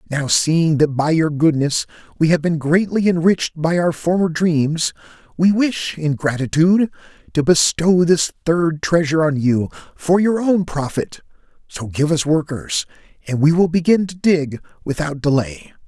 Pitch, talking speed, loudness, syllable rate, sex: 160 Hz, 160 wpm, -17 LUFS, 4.5 syllables/s, male